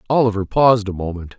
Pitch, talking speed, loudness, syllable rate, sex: 105 Hz, 175 wpm, -17 LUFS, 6.7 syllables/s, male